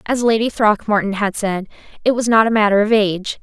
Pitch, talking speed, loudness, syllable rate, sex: 210 Hz, 210 wpm, -16 LUFS, 5.8 syllables/s, female